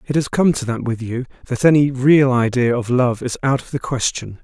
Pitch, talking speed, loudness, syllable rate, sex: 125 Hz, 245 wpm, -18 LUFS, 5.2 syllables/s, male